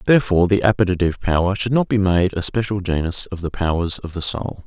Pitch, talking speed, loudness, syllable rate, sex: 95 Hz, 220 wpm, -19 LUFS, 6.3 syllables/s, male